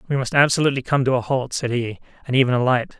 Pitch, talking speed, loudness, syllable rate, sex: 130 Hz, 240 wpm, -20 LUFS, 7.1 syllables/s, male